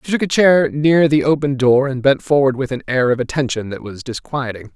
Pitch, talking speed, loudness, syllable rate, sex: 135 Hz, 240 wpm, -16 LUFS, 5.4 syllables/s, male